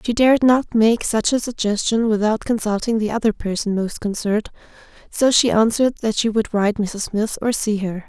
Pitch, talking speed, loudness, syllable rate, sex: 220 Hz, 195 wpm, -19 LUFS, 5.3 syllables/s, female